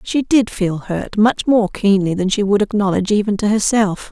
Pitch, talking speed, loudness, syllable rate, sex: 205 Hz, 190 wpm, -16 LUFS, 5.0 syllables/s, female